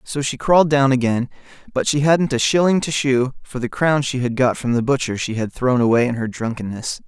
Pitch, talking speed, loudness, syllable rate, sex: 130 Hz, 240 wpm, -19 LUFS, 5.5 syllables/s, male